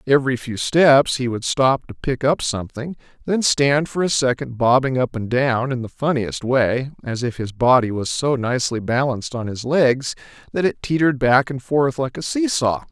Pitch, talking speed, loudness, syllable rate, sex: 130 Hz, 200 wpm, -19 LUFS, 4.9 syllables/s, male